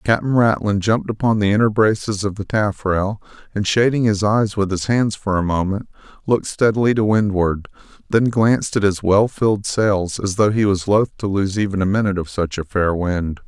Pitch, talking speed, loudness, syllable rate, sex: 105 Hz, 205 wpm, -18 LUFS, 5.3 syllables/s, male